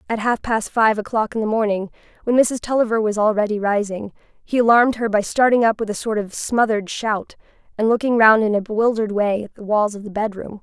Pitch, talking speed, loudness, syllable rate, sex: 215 Hz, 220 wpm, -19 LUFS, 5.9 syllables/s, female